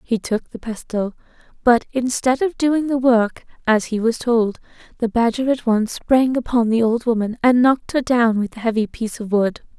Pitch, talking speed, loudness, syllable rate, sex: 235 Hz, 200 wpm, -19 LUFS, 4.9 syllables/s, female